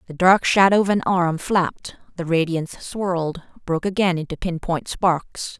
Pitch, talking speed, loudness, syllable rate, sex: 175 Hz, 160 wpm, -20 LUFS, 4.9 syllables/s, female